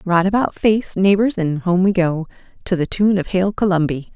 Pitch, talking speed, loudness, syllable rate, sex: 185 Hz, 200 wpm, -18 LUFS, 5.0 syllables/s, female